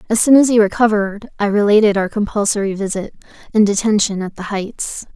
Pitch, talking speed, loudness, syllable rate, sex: 205 Hz, 175 wpm, -16 LUFS, 5.9 syllables/s, female